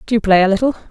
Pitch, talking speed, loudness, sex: 210 Hz, 330 wpm, -14 LUFS, female